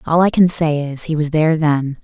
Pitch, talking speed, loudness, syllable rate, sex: 155 Hz, 265 wpm, -16 LUFS, 5.3 syllables/s, female